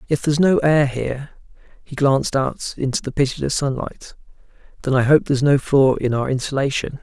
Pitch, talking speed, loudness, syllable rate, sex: 140 Hz, 170 wpm, -19 LUFS, 5.6 syllables/s, male